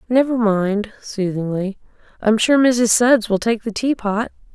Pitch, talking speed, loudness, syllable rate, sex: 220 Hz, 145 wpm, -18 LUFS, 4.1 syllables/s, female